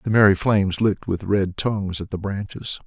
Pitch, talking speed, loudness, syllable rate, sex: 100 Hz, 210 wpm, -22 LUFS, 5.5 syllables/s, male